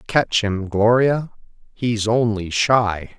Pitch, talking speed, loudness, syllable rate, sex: 110 Hz, 115 wpm, -19 LUFS, 3.1 syllables/s, male